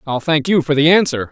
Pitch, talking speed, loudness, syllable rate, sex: 150 Hz, 275 wpm, -14 LUFS, 6.0 syllables/s, male